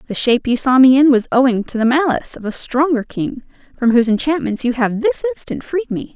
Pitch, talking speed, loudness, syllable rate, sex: 255 Hz, 235 wpm, -16 LUFS, 6.2 syllables/s, female